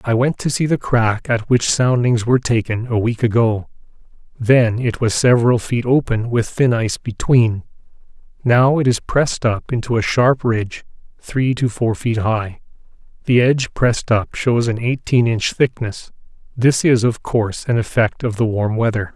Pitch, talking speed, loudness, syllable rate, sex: 120 Hz, 170 wpm, -17 LUFS, 4.7 syllables/s, male